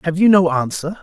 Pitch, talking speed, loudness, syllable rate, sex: 170 Hz, 235 wpm, -15 LUFS, 5.6 syllables/s, male